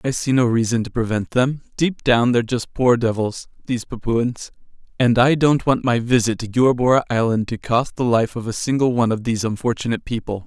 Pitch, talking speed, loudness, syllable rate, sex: 120 Hz, 205 wpm, -19 LUFS, 5.7 syllables/s, male